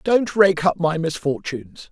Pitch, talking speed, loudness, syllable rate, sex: 180 Hz, 155 wpm, -20 LUFS, 4.4 syllables/s, male